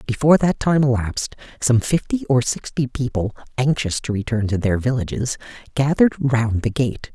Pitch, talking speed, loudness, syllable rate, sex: 125 Hz, 160 wpm, -20 LUFS, 5.2 syllables/s, male